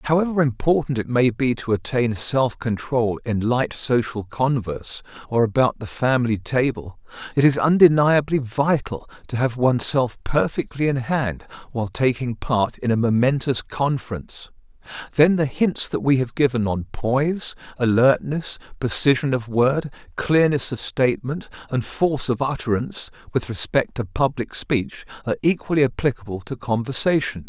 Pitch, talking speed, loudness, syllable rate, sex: 130 Hz, 140 wpm, -21 LUFS, 4.8 syllables/s, male